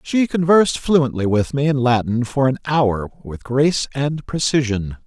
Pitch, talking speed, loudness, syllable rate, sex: 135 Hz, 165 wpm, -18 LUFS, 4.5 syllables/s, male